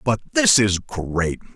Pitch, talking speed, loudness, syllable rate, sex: 115 Hz, 155 wpm, -19 LUFS, 3.4 syllables/s, male